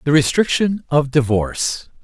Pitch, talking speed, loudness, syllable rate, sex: 145 Hz, 120 wpm, -18 LUFS, 4.6 syllables/s, male